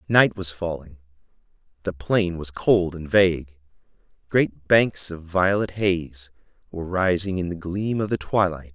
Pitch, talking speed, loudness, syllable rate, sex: 90 Hz, 150 wpm, -23 LUFS, 4.2 syllables/s, male